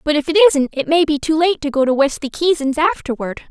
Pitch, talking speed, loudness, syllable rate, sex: 295 Hz, 255 wpm, -16 LUFS, 5.8 syllables/s, female